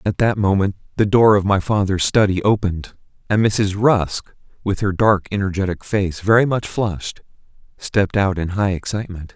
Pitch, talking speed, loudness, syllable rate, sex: 100 Hz, 165 wpm, -18 LUFS, 5.1 syllables/s, male